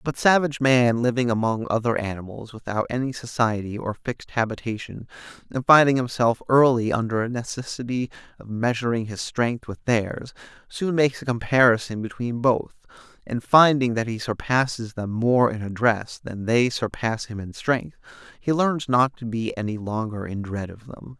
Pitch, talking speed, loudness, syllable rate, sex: 120 Hz, 165 wpm, -23 LUFS, 5.0 syllables/s, male